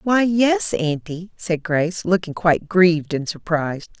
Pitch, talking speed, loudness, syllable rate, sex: 175 Hz, 150 wpm, -20 LUFS, 4.5 syllables/s, female